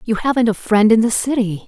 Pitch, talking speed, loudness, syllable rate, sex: 225 Hz, 250 wpm, -16 LUFS, 5.7 syllables/s, female